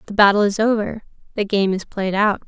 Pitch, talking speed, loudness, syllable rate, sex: 205 Hz, 195 wpm, -19 LUFS, 5.6 syllables/s, female